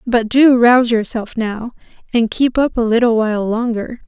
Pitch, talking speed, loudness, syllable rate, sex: 235 Hz, 175 wpm, -15 LUFS, 4.8 syllables/s, female